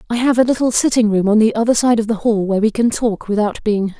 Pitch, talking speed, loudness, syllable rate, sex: 220 Hz, 300 wpm, -16 LUFS, 6.6 syllables/s, female